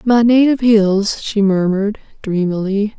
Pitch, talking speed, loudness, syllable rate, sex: 210 Hz, 120 wpm, -15 LUFS, 4.6 syllables/s, female